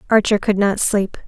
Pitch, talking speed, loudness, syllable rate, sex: 205 Hz, 190 wpm, -17 LUFS, 4.8 syllables/s, female